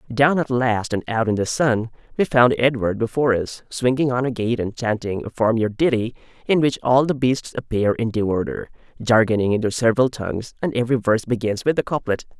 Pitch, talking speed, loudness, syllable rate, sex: 120 Hz, 215 wpm, -20 LUFS, 5.7 syllables/s, male